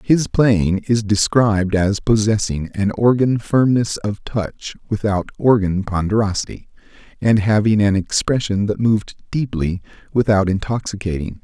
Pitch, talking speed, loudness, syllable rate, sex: 105 Hz, 120 wpm, -18 LUFS, 4.5 syllables/s, male